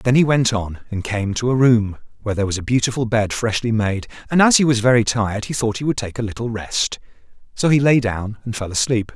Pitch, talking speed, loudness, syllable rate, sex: 115 Hz, 250 wpm, -19 LUFS, 5.9 syllables/s, male